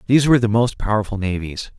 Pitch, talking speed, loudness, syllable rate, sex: 110 Hz, 200 wpm, -19 LUFS, 7.0 syllables/s, male